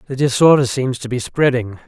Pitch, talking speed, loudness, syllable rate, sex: 125 Hz, 190 wpm, -16 LUFS, 5.5 syllables/s, male